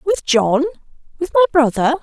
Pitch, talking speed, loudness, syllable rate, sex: 300 Hz, 150 wpm, -16 LUFS, 5.1 syllables/s, female